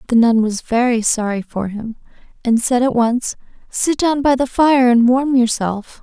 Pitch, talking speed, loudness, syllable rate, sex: 240 Hz, 190 wpm, -16 LUFS, 4.4 syllables/s, female